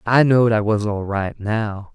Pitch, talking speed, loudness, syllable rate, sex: 110 Hz, 215 wpm, -19 LUFS, 4.4 syllables/s, male